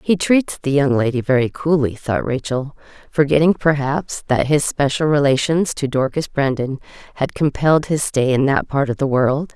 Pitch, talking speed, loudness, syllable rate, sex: 140 Hz, 175 wpm, -18 LUFS, 4.8 syllables/s, female